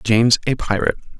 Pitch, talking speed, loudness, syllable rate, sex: 115 Hz, 150 wpm, -18 LUFS, 7.1 syllables/s, male